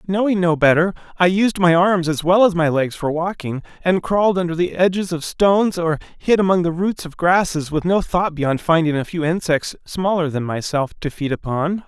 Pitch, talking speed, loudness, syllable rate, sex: 170 Hz, 210 wpm, -18 LUFS, 5.1 syllables/s, male